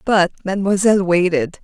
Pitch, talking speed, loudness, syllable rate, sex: 185 Hz, 110 wpm, -16 LUFS, 5.7 syllables/s, female